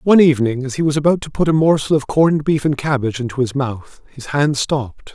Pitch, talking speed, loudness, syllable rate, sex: 140 Hz, 245 wpm, -17 LUFS, 6.3 syllables/s, male